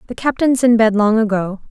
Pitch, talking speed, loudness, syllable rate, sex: 225 Hz, 210 wpm, -15 LUFS, 5.5 syllables/s, female